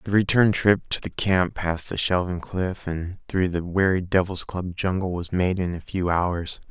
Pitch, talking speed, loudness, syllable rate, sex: 90 Hz, 205 wpm, -24 LUFS, 4.4 syllables/s, male